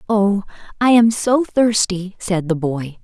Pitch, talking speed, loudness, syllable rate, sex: 205 Hz, 160 wpm, -17 LUFS, 3.7 syllables/s, female